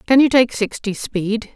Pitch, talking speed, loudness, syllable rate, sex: 225 Hz, 195 wpm, -18 LUFS, 4.3 syllables/s, female